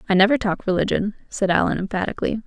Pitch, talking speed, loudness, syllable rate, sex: 200 Hz, 170 wpm, -21 LUFS, 7.1 syllables/s, female